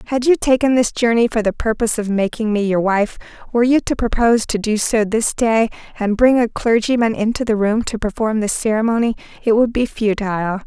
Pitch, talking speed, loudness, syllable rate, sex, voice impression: 225 Hz, 210 wpm, -17 LUFS, 5.7 syllables/s, female, very feminine, slightly young, slightly adult-like, thin, tensed, slightly powerful, bright, slightly hard, clear, very fluent, slightly raspy, cute, very intellectual, refreshing, sincere, slightly calm, friendly, reassuring, unique, elegant, slightly sweet, lively, kind, intense, slightly sharp, slightly light